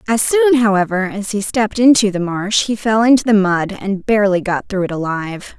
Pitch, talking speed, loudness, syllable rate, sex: 205 Hz, 215 wpm, -15 LUFS, 5.3 syllables/s, female